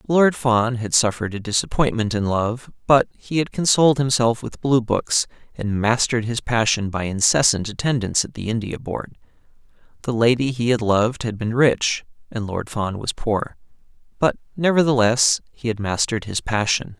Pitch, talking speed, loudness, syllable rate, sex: 115 Hz, 165 wpm, -20 LUFS, 5.0 syllables/s, male